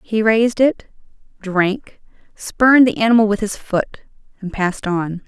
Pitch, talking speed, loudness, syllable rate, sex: 210 Hz, 150 wpm, -16 LUFS, 4.6 syllables/s, female